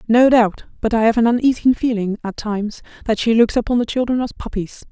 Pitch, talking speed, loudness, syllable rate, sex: 230 Hz, 220 wpm, -18 LUFS, 5.9 syllables/s, female